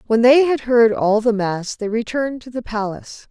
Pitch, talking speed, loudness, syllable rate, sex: 225 Hz, 220 wpm, -18 LUFS, 5.1 syllables/s, female